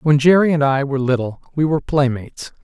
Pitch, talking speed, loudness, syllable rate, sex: 140 Hz, 205 wpm, -17 LUFS, 6.3 syllables/s, male